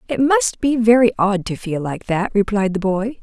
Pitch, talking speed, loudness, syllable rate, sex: 215 Hz, 225 wpm, -18 LUFS, 4.7 syllables/s, female